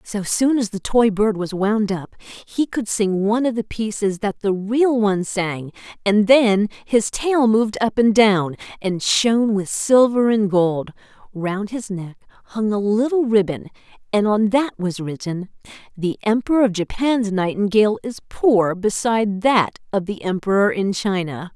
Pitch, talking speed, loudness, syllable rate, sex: 210 Hz, 170 wpm, -19 LUFS, 4.4 syllables/s, female